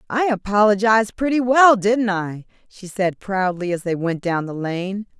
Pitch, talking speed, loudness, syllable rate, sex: 205 Hz, 175 wpm, -19 LUFS, 4.5 syllables/s, female